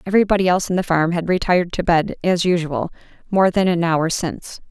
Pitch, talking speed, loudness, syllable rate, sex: 175 Hz, 205 wpm, -18 LUFS, 6.2 syllables/s, female